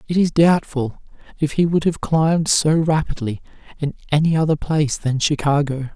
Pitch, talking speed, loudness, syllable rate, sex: 150 Hz, 160 wpm, -19 LUFS, 5.1 syllables/s, male